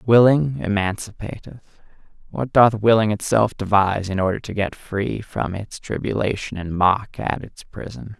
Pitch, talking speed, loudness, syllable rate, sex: 105 Hz, 145 wpm, -20 LUFS, 4.6 syllables/s, male